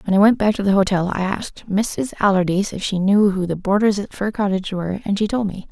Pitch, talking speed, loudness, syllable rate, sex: 195 Hz, 260 wpm, -19 LUFS, 6.4 syllables/s, female